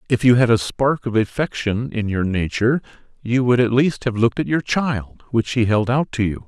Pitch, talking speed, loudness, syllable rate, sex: 120 Hz, 230 wpm, -19 LUFS, 5.2 syllables/s, male